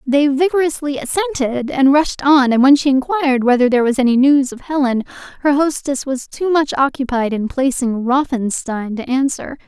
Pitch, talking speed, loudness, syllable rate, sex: 270 Hz, 175 wpm, -16 LUFS, 5.1 syllables/s, female